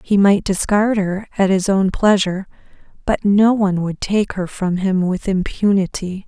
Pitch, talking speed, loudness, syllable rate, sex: 195 Hz, 170 wpm, -17 LUFS, 4.5 syllables/s, female